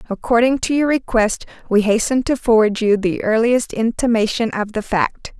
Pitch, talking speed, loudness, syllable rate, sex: 230 Hz, 165 wpm, -17 LUFS, 4.9 syllables/s, female